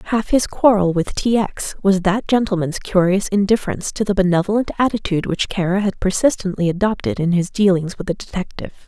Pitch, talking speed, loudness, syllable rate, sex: 195 Hz, 175 wpm, -18 LUFS, 6.0 syllables/s, female